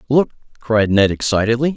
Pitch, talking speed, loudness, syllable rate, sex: 120 Hz, 135 wpm, -17 LUFS, 5.5 syllables/s, male